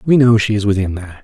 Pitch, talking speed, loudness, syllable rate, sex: 110 Hz, 290 wpm, -14 LUFS, 7.2 syllables/s, male